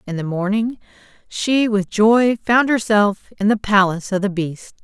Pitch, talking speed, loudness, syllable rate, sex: 210 Hz, 175 wpm, -18 LUFS, 4.4 syllables/s, female